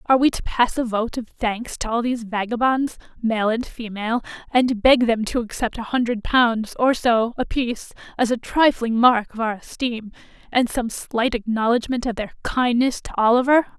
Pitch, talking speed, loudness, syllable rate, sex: 235 Hz, 185 wpm, -21 LUFS, 4.9 syllables/s, female